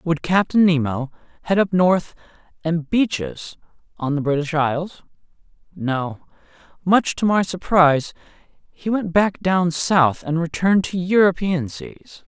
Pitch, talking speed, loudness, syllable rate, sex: 165 Hz, 135 wpm, -20 LUFS, 4.0 syllables/s, male